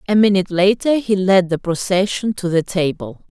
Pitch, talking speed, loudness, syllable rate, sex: 190 Hz, 180 wpm, -17 LUFS, 5.1 syllables/s, female